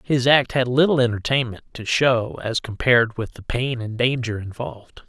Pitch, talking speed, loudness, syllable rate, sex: 120 Hz, 175 wpm, -21 LUFS, 4.9 syllables/s, male